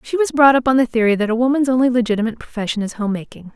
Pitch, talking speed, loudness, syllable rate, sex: 240 Hz, 255 wpm, -17 LUFS, 7.8 syllables/s, female